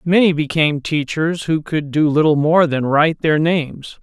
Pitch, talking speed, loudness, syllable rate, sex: 155 Hz, 180 wpm, -16 LUFS, 4.8 syllables/s, male